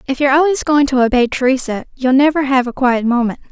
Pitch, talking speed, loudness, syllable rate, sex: 265 Hz, 220 wpm, -14 LUFS, 6.4 syllables/s, female